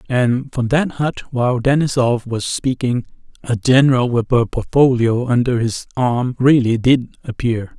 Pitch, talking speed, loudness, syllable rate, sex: 125 Hz, 145 wpm, -17 LUFS, 4.4 syllables/s, male